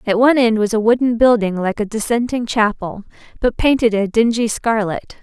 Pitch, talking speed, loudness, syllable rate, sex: 225 Hz, 185 wpm, -16 LUFS, 5.3 syllables/s, female